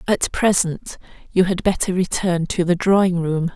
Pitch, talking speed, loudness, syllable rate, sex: 180 Hz, 170 wpm, -19 LUFS, 4.6 syllables/s, female